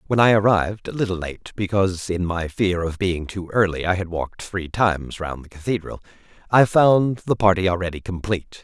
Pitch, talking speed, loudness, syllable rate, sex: 95 Hz, 195 wpm, -21 LUFS, 5.5 syllables/s, male